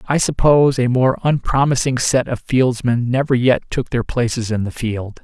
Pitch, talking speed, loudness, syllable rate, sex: 125 Hz, 185 wpm, -17 LUFS, 4.9 syllables/s, male